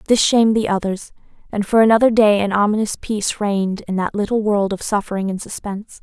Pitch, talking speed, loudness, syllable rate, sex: 210 Hz, 200 wpm, -18 LUFS, 6.0 syllables/s, female